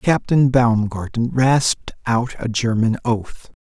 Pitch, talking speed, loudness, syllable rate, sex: 120 Hz, 115 wpm, -19 LUFS, 3.7 syllables/s, male